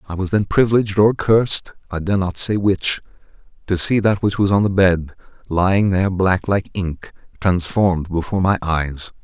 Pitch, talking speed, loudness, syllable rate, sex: 95 Hz, 180 wpm, -18 LUFS, 5.2 syllables/s, male